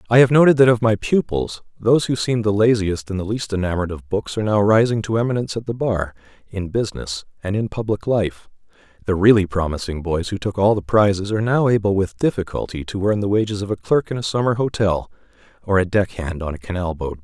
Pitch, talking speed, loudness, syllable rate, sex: 105 Hz, 225 wpm, -19 LUFS, 6.2 syllables/s, male